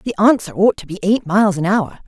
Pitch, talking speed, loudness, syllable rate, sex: 200 Hz, 260 wpm, -16 LUFS, 6.0 syllables/s, female